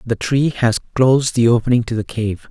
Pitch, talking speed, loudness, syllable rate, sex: 120 Hz, 215 wpm, -17 LUFS, 5.3 syllables/s, male